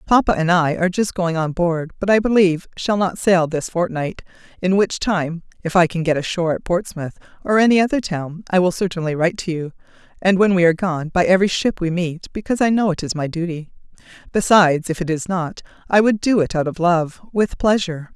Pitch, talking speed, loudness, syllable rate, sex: 180 Hz, 220 wpm, -19 LUFS, 5.9 syllables/s, female